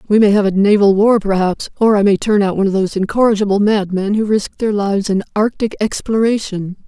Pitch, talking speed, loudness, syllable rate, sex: 205 Hz, 210 wpm, -15 LUFS, 6.0 syllables/s, female